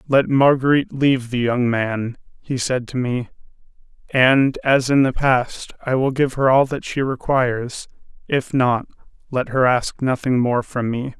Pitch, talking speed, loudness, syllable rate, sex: 130 Hz, 170 wpm, -19 LUFS, 4.4 syllables/s, male